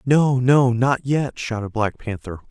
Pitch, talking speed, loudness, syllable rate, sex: 125 Hz, 170 wpm, -20 LUFS, 3.8 syllables/s, male